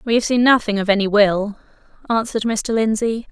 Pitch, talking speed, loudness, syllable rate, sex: 220 Hz, 165 wpm, -17 LUFS, 5.6 syllables/s, female